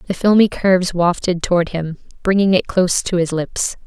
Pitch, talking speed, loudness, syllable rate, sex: 180 Hz, 185 wpm, -17 LUFS, 5.3 syllables/s, female